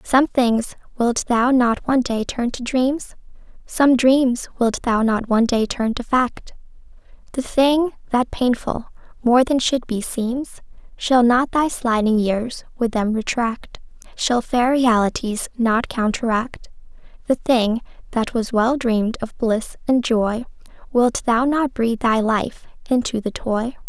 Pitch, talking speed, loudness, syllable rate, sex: 240 Hz, 155 wpm, -20 LUFS, 3.9 syllables/s, female